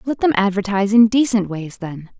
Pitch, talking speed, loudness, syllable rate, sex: 210 Hz, 190 wpm, -17 LUFS, 5.5 syllables/s, female